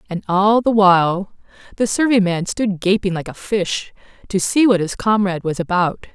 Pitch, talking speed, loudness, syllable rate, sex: 195 Hz, 185 wpm, -17 LUFS, 4.9 syllables/s, female